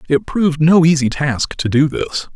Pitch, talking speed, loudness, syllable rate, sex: 150 Hz, 205 wpm, -15 LUFS, 4.7 syllables/s, male